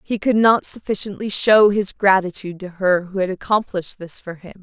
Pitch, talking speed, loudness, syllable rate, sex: 195 Hz, 195 wpm, -18 LUFS, 5.3 syllables/s, female